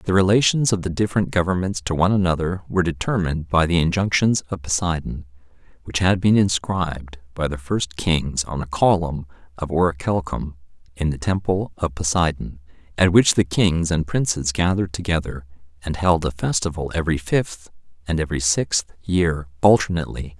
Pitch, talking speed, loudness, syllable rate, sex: 85 Hz, 155 wpm, -21 LUFS, 5.4 syllables/s, male